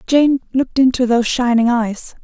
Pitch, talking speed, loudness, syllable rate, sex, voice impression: 245 Hz, 160 wpm, -15 LUFS, 5.3 syllables/s, female, feminine, slightly adult-like, intellectual, friendly, slightly elegant, slightly sweet